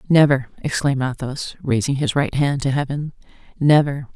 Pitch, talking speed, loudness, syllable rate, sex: 140 Hz, 145 wpm, -20 LUFS, 5.0 syllables/s, female